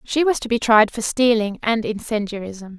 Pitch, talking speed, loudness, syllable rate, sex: 225 Hz, 195 wpm, -19 LUFS, 4.9 syllables/s, female